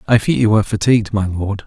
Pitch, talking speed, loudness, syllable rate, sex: 105 Hz, 250 wpm, -16 LUFS, 6.7 syllables/s, male